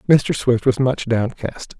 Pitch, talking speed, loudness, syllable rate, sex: 125 Hz, 165 wpm, -19 LUFS, 3.8 syllables/s, male